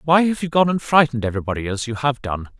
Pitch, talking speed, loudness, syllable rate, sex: 130 Hz, 255 wpm, -19 LUFS, 7.0 syllables/s, male